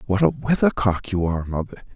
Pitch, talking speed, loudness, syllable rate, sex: 110 Hz, 185 wpm, -22 LUFS, 5.8 syllables/s, male